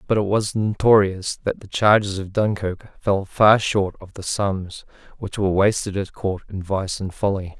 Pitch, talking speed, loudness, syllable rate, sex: 100 Hz, 190 wpm, -21 LUFS, 4.5 syllables/s, male